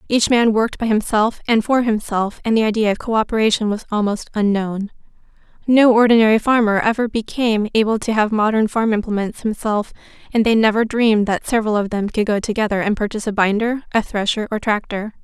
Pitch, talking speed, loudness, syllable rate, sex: 215 Hz, 185 wpm, -18 LUFS, 6.0 syllables/s, female